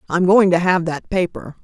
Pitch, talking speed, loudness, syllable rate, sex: 180 Hz, 220 wpm, -17 LUFS, 5.0 syllables/s, female